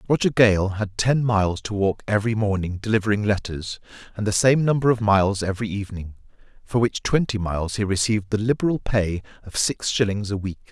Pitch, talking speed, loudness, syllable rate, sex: 105 Hz, 185 wpm, -22 LUFS, 5.9 syllables/s, male